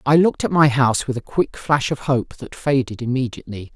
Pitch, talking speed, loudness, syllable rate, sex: 130 Hz, 225 wpm, -19 LUFS, 5.8 syllables/s, male